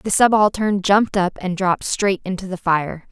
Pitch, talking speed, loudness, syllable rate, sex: 190 Hz, 195 wpm, -18 LUFS, 4.9 syllables/s, female